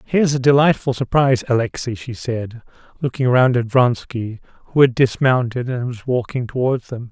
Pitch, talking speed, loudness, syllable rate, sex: 125 Hz, 160 wpm, -18 LUFS, 5.1 syllables/s, male